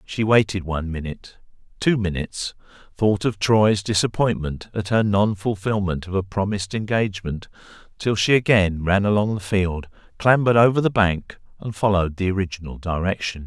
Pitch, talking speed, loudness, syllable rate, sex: 100 Hz, 145 wpm, -21 LUFS, 5.4 syllables/s, male